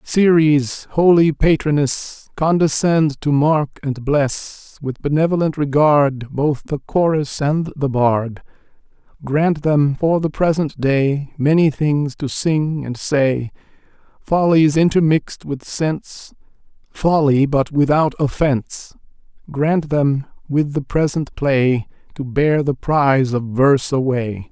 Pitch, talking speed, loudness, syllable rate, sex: 145 Hz, 120 wpm, -17 LUFS, 3.6 syllables/s, male